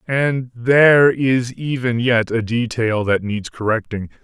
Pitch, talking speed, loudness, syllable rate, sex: 120 Hz, 140 wpm, -17 LUFS, 3.8 syllables/s, male